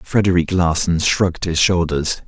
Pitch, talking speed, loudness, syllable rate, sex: 90 Hz, 130 wpm, -17 LUFS, 4.7 syllables/s, male